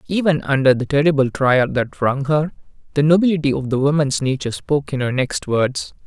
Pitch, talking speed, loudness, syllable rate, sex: 140 Hz, 190 wpm, -18 LUFS, 5.6 syllables/s, male